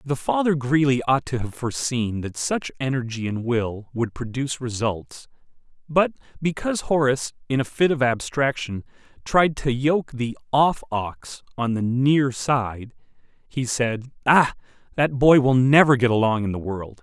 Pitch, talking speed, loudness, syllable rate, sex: 130 Hz, 160 wpm, -22 LUFS, 4.5 syllables/s, male